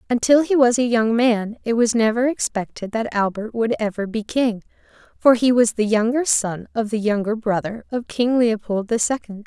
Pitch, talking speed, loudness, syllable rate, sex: 225 Hz, 195 wpm, -20 LUFS, 4.9 syllables/s, female